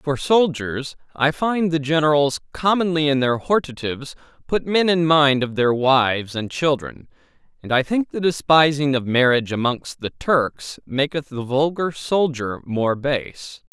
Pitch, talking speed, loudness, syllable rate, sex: 145 Hz, 155 wpm, -20 LUFS, 4.3 syllables/s, male